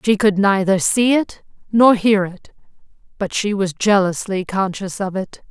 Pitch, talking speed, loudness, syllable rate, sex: 200 Hz, 165 wpm, -17 LUFS, 4.3 syllables/s, female